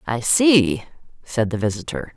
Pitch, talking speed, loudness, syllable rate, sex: 130 Hz, 140 wpm, -19 LUFS, 4.4 syllables/s, female